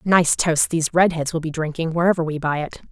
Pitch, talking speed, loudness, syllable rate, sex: 165 Hz, 225 wpm, -20 LUFS, 6.2 syllables/s, female